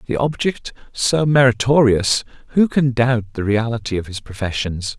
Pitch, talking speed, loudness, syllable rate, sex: 120 Hz, 145 wpm, -18 LUFS, 4.7 syllables/s, male